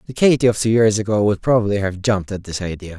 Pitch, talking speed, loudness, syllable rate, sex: 105 Hz, 260 wpm, -18 LUFS, 6.7 syllables/s, male